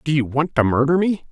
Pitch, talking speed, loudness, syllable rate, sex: 145 Hz, 275 wpm, -19 LUFS, 5.9 syllables/s, male